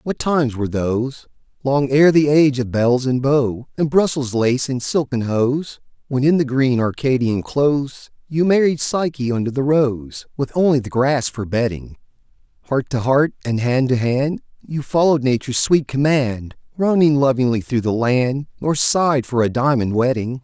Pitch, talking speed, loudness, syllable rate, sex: 135 Hz, 175 wpm, -18 LUFS, 4.8 syllables/s, male